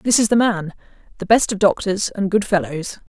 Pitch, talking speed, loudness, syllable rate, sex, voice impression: 200 Hz, 190 wpm, -18 LUFS, 5.1 syllables/s, female, feminine, adult-like, tensed, powerful, hard, clear, intellectual, calm, elegant, lively, strict, sharp